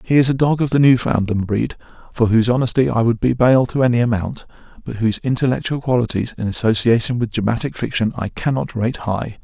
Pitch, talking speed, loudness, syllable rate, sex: 120 Hz, 195 wpm, -18 LUFS, 6.0 syllables/s, male